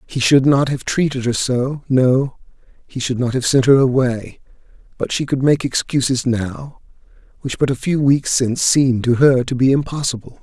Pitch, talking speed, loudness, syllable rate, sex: 130 Hz, 190 wpm, -17 LUFS, 4.9 syllables/s, male